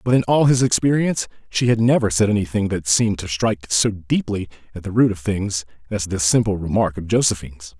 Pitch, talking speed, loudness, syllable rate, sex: 100 Hz, 210 wpm, -19 LUFS, 5.9 syllables/s, male